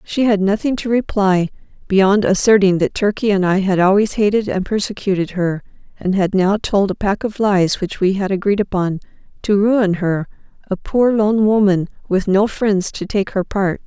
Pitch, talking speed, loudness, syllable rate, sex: 200 Hz, 190 wpm, -17 LUFS, 4.8 syllables/s, female